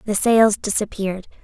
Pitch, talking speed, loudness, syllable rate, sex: 205 Hz, 125 wpm, -19 LUFS, 5.1 syllables/s, female